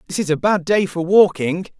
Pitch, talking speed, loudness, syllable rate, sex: 180 Hz, 235 wpm, -17 LUFS, 5.4 syllables/s, male